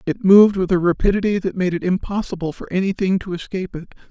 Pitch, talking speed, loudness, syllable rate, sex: 185 Hz, 205 wpm, -18 LUFS, 6.7 syllables/s, male